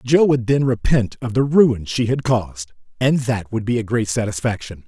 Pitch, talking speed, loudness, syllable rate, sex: 115 Hz, 210 wpm, -19 LUFS, 4.9 syllables/s, male